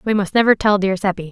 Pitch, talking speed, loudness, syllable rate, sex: 200 Hz, 275 wpm, -16 LUFS, 6.6 syllables/s, female